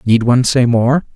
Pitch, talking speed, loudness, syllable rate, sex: 125 Hz, 210 wpm, -13 LUFS, 5.2 syllables/s, male